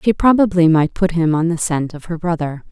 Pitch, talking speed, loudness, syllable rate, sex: 170 Hz, 245 wpm, -16 LUFS, 5.4 syllables/s, female